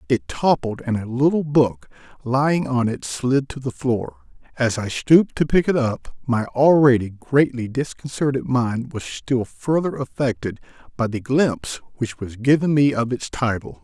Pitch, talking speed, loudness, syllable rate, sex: 125 Hz, 170 wpm, -21 LUFS, 4.5 syllables/s, male